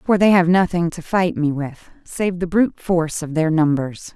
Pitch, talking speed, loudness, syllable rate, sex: 170 Hz, 215 wpm, -19 LUFS, 4.8 syllables/s, female